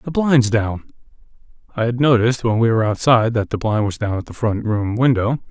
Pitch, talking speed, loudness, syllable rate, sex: 115 Hz, 220 wpm, -18 LUFS, 6.0 syllables/s, male